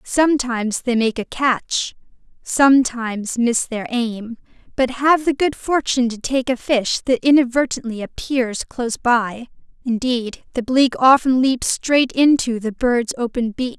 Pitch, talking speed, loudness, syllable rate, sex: 245 Hz, 150 wpm, -18 LUFS, 4.2 syllables/s, female